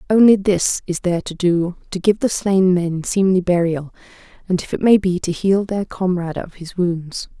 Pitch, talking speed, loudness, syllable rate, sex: 180 Hz, 195 wpm, -18 LUFS, 4.9 syllables/s, female